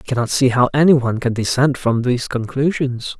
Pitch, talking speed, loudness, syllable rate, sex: 125 Hz, 190 wpm, -17 LUFS, 5.5 syllables/s, male